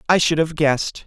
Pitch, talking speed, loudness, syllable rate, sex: 155 Hz, 225 wpm, -19 LUFS, 5.6 syllables/s, male